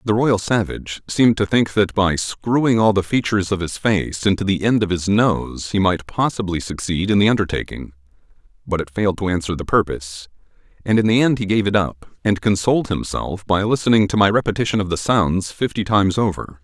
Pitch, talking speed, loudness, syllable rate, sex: 100 Hz, 205 wpm, -19 LUFS, 5.7 syllables/s, male